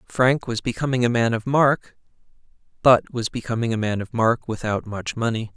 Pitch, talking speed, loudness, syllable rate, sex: 115 Hz, 175 wpm, -22 LUFS, 5.2 syllables/s, male